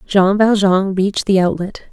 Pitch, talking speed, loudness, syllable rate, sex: 195 Hz, 155 wpm, -15 LUFS, 4.6 syllables/s, female